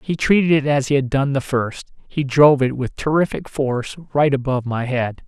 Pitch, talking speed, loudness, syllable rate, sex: 135 Hz, 205 wpm, -19 LUFS, 5.4 syllables/s, male